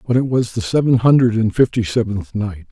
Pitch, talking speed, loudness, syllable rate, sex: 110 Hz, 220 wpm, -17 LUFS, 5.5 syllables/s, male